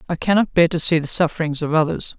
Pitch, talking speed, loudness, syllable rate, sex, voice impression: 165 Hz, 245 wpm, -19 LUFS, 6.5 syllables/s, female, feminine, adult-like, slightly intellectual, slightly calm, slightly sharp